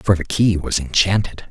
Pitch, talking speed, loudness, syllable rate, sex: 90 Hz, 200 wpm, -18 LUFS, 4.8 syllables/s, male